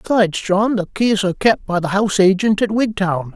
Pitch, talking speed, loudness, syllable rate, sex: 200 Hz, 215 wpm, -17 LUFS, 5.4 syllables/s, male